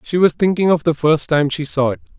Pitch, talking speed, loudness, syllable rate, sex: 155 Hz, 275 wpm, -16 LUFS, 5.7 syllables/s, male